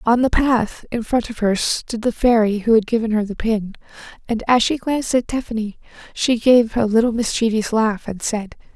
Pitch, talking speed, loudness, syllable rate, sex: 225 Hz, 205 wpm, -19 LUFS, 5.1 syllables/s, female